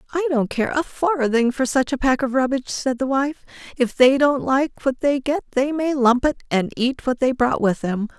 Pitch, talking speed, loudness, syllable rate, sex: 265 Hz, 235 wpm, -20 LUFS, 4.8 syllables/s, female